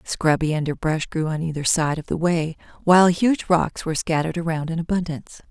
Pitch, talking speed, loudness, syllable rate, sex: 165 Hz, 195 wpm, -21 LUFS, 5.7 syllables/s, female